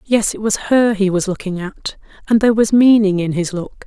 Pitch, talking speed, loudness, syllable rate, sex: 205 Hz, 235 wpm, -15 LUFS, 5.2 syllables/s, female